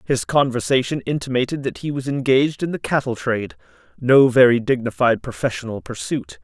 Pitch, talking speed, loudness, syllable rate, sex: 125 Hz, 150 wpm, -19 LUFS, 5.6 syllables/s, male